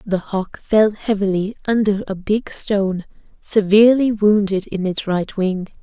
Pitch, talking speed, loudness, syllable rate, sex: 200 Hz, 145 wpm, -18 LUFS, 4.4 syllables/s, female